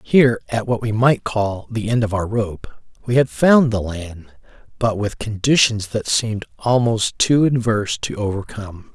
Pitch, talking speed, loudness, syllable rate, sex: 110 Hz, 175 wpm, -19 LUFS, 4.5 syllables/s, male